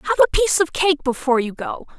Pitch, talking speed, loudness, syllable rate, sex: 295 Hz, 240 wpm, -19 LUFS, 7.1 syllables/s, female